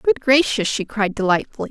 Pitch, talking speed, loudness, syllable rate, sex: 210 Hz, 175 wpm, -18 LUFS, 5.4 syllables/s, female